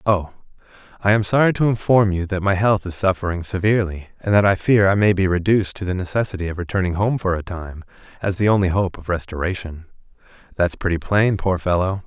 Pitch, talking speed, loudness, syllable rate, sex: 95 Hz, 200 wpm, -20 LUFS, 6.1 syllables/s, male